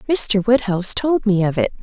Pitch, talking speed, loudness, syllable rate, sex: 215 Hz, 200 wpm, -17 LUFS, 5.1 syllables/s, female